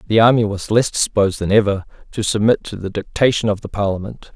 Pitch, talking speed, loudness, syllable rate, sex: 105 Hz, 205 wpm, -18 LUFS, 6.1 syllables/s, male